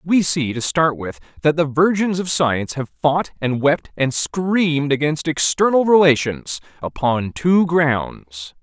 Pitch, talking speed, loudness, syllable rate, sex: 150 Hz, 145 wpm, -18 LUFS, 3.9 syllables/s, male